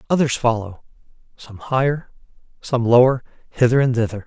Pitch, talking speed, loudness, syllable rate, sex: 120 Hz, 125 wpm, -18 LUFS, 5.4 syllables/s, male